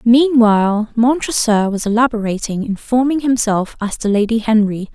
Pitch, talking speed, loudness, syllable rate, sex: 225 Hz, 120 wpm, -15 LUFS, 5.1 syllables/s, female